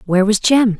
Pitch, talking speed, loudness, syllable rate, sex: 210 Hz, 225 wpm, -14 LUFS, 6.2 syllables/s, female